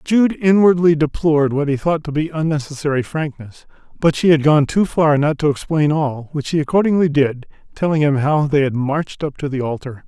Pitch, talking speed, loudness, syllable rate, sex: 150 Hz, 205 wpm, -17 LUFS, 5.4 syllables/s, male